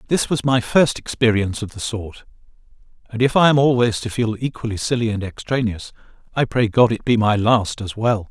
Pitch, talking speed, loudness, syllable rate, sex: 115 Hz, 200 wpm, -19 LUFS, 5.4 syllables/s, male